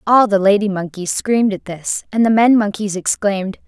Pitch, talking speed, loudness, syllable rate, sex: 205 Hz, 195 wpm, -16 LUFS, 5.3 syllables/s, female